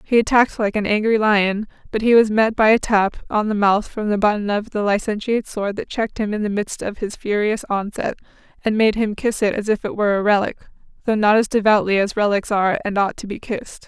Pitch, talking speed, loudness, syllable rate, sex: 210 Hz, 240 wpm, -19 LUFS, 5.9 syllables/s, female